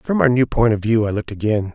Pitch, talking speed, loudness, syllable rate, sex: 115 Hz, 310 wpm, -18 LUFS, 6.4 syllables/s, male